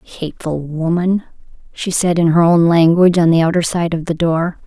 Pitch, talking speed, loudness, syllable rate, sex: 170 Hz, 195 wpm, -15 LUFS, 5.1 syllables/s, female